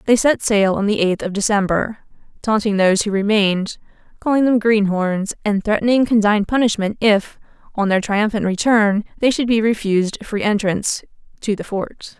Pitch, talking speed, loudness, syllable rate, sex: 210 Hz, 160 wpm, -18 LUFS, 5.1 syllables/s, female